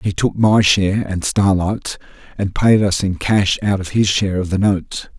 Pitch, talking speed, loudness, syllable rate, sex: 100 Hz, 210 wpm, -16 LUFS, 4.7 syllables/s, male